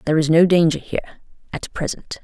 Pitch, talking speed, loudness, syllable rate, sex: 165 Hz, 160 wpm, -19 LUFS, 7.1 syllables/s, female